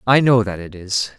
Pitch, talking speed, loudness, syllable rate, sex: 110 Hz, 250 wpm, -18 LUFS, 5.1 syllables/s, male